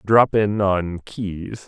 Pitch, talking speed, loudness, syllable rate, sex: 100 Hz, 145 wpm, -20 LUFS, 2.7 syllables/s, male